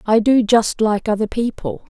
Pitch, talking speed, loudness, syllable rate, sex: 215 Hz, 185 wpm, -17 LUFS, 4.6 syllables/s, female